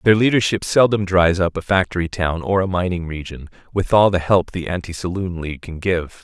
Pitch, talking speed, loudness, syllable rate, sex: 90 Hz, 210 wpm, -19 LUFS, 5.4 syllables/s, male